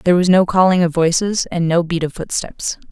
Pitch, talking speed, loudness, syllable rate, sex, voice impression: 175 Hz, 225 wpm, -16 LUFS, 5.4 syllables/s, female, very feminine, adult-like, slightly thin, slightly tensed, powerful, slightly dark, slightly soft, clear, fluent, slightly raspy, slightly cute, cool, intellectual, slightly refreshing, sincere, slightly calm, friendly, reassuring, unique, slightly elegant, wild, sweet, lively, slightly strict, intense